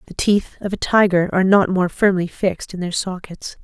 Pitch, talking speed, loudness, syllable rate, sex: 185 Hz, 215 wpm, -18 LUFS, 5.3 syllables/s, female